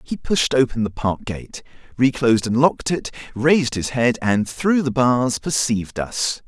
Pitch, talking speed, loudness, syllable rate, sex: 130 Hz, 175 wpm, -20 LUFS, 4.5 syllables/s, male